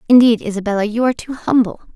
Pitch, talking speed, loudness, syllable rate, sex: 225 Hz, 185 wpm, -16 LUFS, 7.3 syllables/s, female